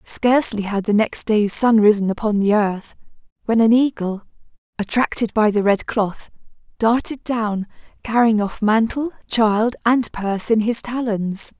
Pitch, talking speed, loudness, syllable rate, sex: 220 Hz, 150 wpm, -18 LUFS, 4.4 syllables/s, female